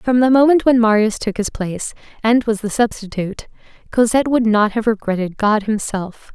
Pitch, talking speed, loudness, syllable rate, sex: 220 Hz, 180 wpm, -17 LUFS, 5.4 syllables/s, female